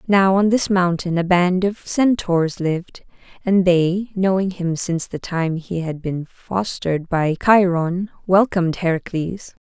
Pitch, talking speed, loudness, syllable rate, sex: 180 Hz, 150 wpm, -19 LUFS, 4.1 syllables/s, female